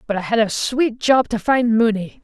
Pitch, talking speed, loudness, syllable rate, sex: 230 Hz, 240 wpm, -18 LUFS, 4.8 syllables/s, female